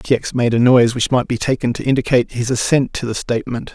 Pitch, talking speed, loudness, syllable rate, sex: 125 Hz, 255 wpm, -17 LUFS, 6.5 syllables/s, male